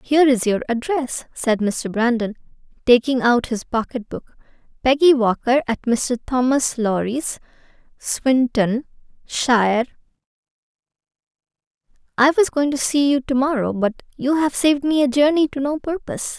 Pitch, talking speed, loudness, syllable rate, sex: 260 Hz, 135 wpm, -19 LUFS, 4.8 syllables/s, female